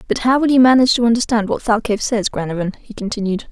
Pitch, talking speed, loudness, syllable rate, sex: 225 Hz, 220 wpm, -16 LUFS, 7.0 syllables/s, female